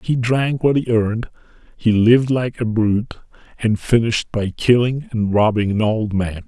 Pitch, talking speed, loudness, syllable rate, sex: 115 Hz, 175 wpm, -18 LUFS, 4.9 syllables/s, male